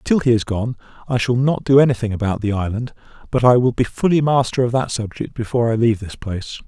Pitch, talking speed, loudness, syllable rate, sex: 120 Hz, 245 wpm, -18 LUFS, 6.4 syllables/s, male